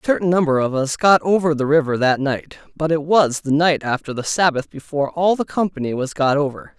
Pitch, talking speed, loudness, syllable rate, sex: 150 Hz, 230 wpm, -18 LUFS, 5.7 syllables/s, male